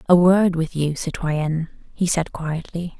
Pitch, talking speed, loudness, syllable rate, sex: 165 Hz, 160 wpm, -21 LUFS, 4.3 syllables/s, female